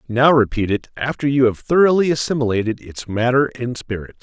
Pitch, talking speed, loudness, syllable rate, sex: 125 Hz, 170 wpm, -18 LUFS, 5.7 syllables/s, male